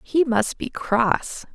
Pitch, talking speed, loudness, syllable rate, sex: 245 Hz, 155 wpm, -22 LUFS, 2.9 syllables/s, female